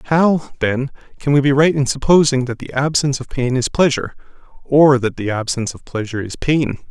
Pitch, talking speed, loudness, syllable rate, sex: 135 Hz, 200 wpm, -17 LUFS, 5.8 syllables/s, male